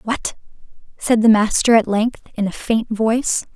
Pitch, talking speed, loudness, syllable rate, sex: 220 Hz, 170 wpm, -17 LUFS, 4.5 syllables/s, female